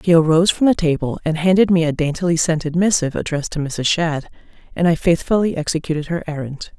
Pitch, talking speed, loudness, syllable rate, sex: 165 Hz, 195 wpm, -18 LUFS, 6.3 syllables/s, female